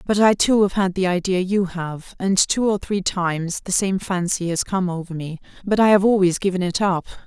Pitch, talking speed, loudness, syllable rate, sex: 185 Hz, 230 wpm, -20 LUFS, 5.1 syllables/s, female